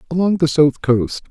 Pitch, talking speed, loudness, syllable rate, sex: 155 Hz, 185 wpm, -16 LUFS, 4.8 syllables/s, male